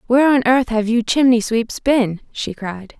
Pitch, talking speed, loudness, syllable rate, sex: 235 Hz, 200 wpm, -17 LUFS, 4.4 syllables/s, female